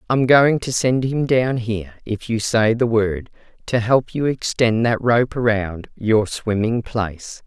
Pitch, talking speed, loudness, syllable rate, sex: 115 Hz, 175 wpm, -19 LUFS, 4.0 syllables/s, female